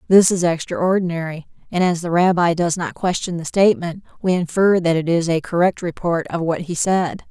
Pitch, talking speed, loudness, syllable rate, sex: 170 Hz, 195 wpm, -19 LUFS, 5.3 syllables/s, female